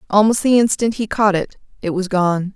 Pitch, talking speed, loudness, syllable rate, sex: 200 Hz, 210 wpm, -17 LUFS, 5.2 syllables/s, female